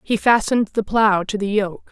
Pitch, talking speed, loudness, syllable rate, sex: 210 Hz, 220 wpm, -18 LUFS, 5.0 syllables/s, female